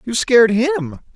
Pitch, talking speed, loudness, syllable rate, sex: 235 Hz, 155 wpm, -15 LUFS, 6.5 syllables/s, male